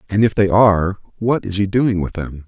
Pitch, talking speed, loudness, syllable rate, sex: 100 Hz, 245 wpm, -17 LUFS, 5.3 syllables/s, male